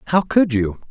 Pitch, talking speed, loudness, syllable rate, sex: 145 Hz, 200 wpm, -18 LUFS, 5.1 syllables/s, male